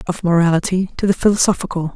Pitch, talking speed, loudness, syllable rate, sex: 180 Hz, 155 wpm, -17 LUFS, 6.8 syllables/s, female